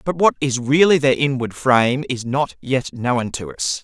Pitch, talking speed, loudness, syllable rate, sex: 130 Hz, 205 wpm, -18 LUFS, 4.5 syllables/s, male